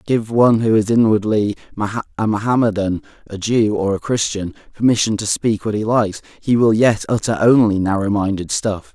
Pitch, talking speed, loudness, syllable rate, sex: 105 Hz, 175 wpm, -17 LUFS, 5.1 syllables/s, male